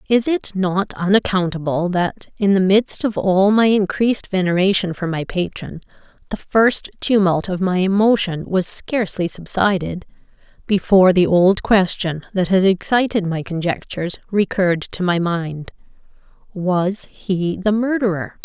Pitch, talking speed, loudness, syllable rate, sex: 190 Hz, 135 wpm, -18 LUFS, 4.5 syllables/s, female